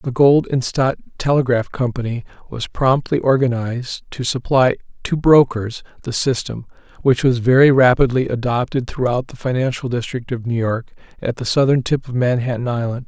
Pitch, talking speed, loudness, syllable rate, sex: 125 Hz, 155 wpm, -18 LUFS, 5.1 syllables/s, male